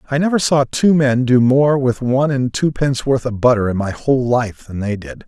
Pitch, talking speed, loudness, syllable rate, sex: 130 Hz, 240 wpm, -16 LUFS, 5.4 syllables/s, male